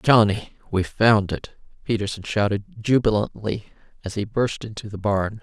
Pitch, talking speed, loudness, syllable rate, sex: 105 Hz, 145 wpm, -23 LUFS, 4.9 syllables/s, female